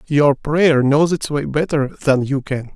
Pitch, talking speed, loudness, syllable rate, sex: 145 Hz, 195 wpm, -17 LUFS, 3.9 syllables/s, male